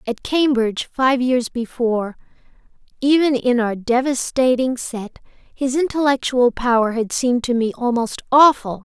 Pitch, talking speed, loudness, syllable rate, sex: 250 Hz, 125 wpm, -18 LUFS, 4.6 syllables/s, female